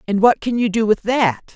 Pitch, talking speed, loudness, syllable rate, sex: 215 Hz, 270 wpm, -17 LUFS, 5.0 syllables/s, female